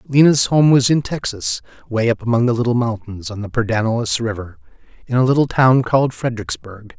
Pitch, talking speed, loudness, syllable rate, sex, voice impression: 115 Hz, 180 wpm, -17 LUFS, 5.9 syllables/s, male, masculine, middle-aged, slightly powerful, muffled, slightly raspy, calm, mature, slightly friendly, wild, kind